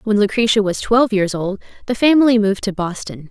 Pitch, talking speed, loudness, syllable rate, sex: 210 Hz, 200 wpm, -16 LUFS, 6.1 syllables/s, female